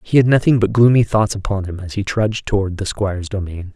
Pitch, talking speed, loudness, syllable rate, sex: 100 Hz, 240 wpm, -17 LUFS, 6.0 syllables/s, male